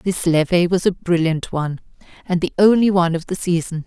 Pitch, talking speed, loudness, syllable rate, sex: 175 Hz, 200 wpm, -18 LUFS, 5.7 syllables/s, female